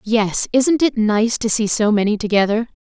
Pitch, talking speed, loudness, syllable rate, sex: 220 Hz, 190 wpm, -17 LUFS, 4.6 syllables/s, female